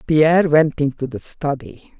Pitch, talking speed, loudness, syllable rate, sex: 150 Hz, 150 wpm, -18 LUFS, 4.4 syllables/s, female